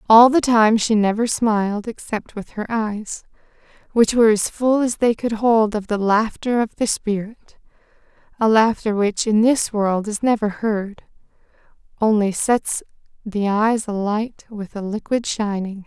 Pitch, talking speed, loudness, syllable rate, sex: 215 Hz, 155 wpm, -19 LUFS, 4.2 syllables/s, female